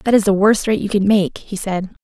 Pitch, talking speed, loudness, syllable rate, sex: 200 Hz, 295 wpm, -17 LUFS, 5.3 syllables/s, female